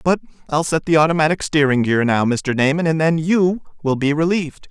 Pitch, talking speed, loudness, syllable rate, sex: 155 Hz, 205 wpm, -18 LUFS, 5.6 syllables/s, male